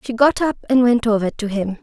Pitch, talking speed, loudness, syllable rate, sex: 230 Hz, 265 wpm, -18 LUFS, 5.7 syllables/s, female